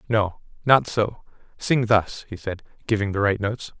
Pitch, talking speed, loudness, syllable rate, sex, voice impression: 105 Hz, 160 wpm, -23 LUFS, 4.7 syllables/s, male, masculine, adult-like, slightly thick, fluent, sincere, slightly kind